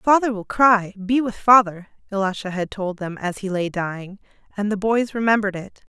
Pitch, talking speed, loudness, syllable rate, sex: 205 Hz, 190 wpm, -20 LUFS, 5.2 syllables/s, female